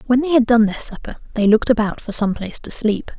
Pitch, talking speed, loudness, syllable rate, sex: 225 Hz, 265 wpm, -18 LUFS, 6.3 syllables/s, female